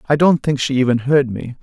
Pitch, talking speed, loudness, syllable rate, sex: 135 Hz, 260 wpm, -16 LUFS, 5.4 syllables/s, male